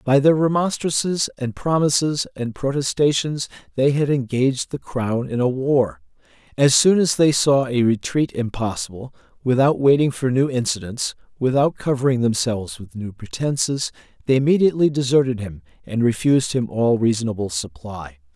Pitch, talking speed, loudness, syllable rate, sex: 130 Hz, 145 wpm, -20 LUFS, 5.1 syllables/s, male